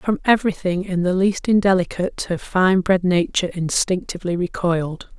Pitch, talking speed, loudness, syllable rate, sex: 185 Hz, 125 wpm, -20 LUFS, 5.6 syllables/s, female